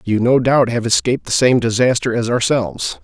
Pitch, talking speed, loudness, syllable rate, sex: 120 Hz, 195 wpm, -16 LUFS, 5.5 syllables/s, male